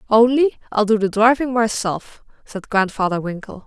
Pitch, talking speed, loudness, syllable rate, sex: 220 Hz, 145 wpm, -18 LUFS, 4.8 syllables/s, female